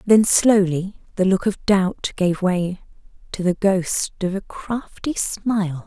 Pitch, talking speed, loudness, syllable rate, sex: 190 Hz, 155 wpm, -20 LUFS, 3.6 syllables/s, female